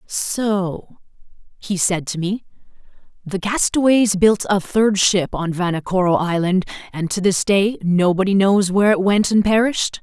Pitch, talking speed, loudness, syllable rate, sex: 195 Hz, 150 wpm, -18 LUFS, 4.4 syllables/s, female